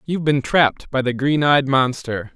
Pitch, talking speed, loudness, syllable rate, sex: 135 Hz, 205 wpm, -18 LUFS, 4.9 syllables/s, male